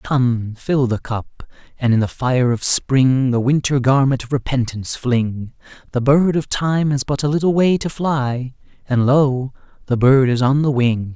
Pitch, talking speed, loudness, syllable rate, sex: 130 Hz, 185 wpm, -17 LUFS, 4.2 syllables/s, male